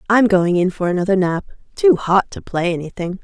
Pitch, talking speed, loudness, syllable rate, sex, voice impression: 190 Hz, 205 wpm, -17 LUFS, 5.4 syllables/s, female, feminine, adult-like, slightly fluent, slightly sincere, calm, slightly elegant